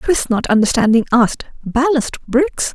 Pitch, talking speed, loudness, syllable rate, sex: 255 Hz, 130 wpm, -15 LUFS, 4.5 syllables/s, female